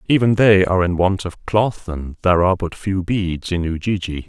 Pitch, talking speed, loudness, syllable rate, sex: 95 Hz, 210 wpm, -18 LUFS, 5.2 syllables/s, male